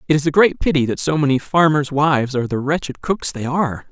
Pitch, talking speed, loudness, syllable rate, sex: 145 Hz, 245 wpm, -18 LUFS, 6.2 syllables/s, male